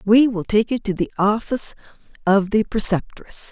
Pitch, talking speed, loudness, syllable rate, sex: 210 Hz, 170 wpm, -20 LUFS, 5.0 syllables/s, female